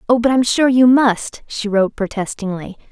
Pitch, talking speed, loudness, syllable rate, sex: 225 Hz, 205 wpm, -16 LUFS, 5.5 syllables/s, female